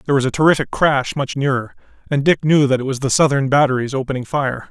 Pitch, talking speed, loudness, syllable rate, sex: 135 Hz, 230 wpm, -17 LUFS, 6.4 syllables/s, male